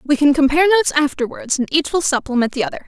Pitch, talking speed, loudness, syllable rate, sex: 295 Hz, 230 wpm, -17 LUFS, 7.8 syllables/s, female